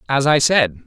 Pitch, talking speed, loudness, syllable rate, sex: 135 Hz, 210 wpm, -15 LUFS, 5.1 syllables/s, male